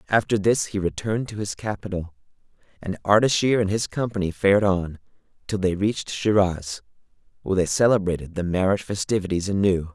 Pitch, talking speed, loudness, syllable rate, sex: 100 Hz, 150 wpm, -23 LUFS, 5.9 syllables/s, male